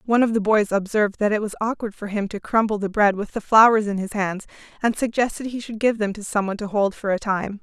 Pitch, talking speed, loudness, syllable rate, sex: 210 Hz, 275 wpm, -21 LUFS, 6.2 syllables/s, female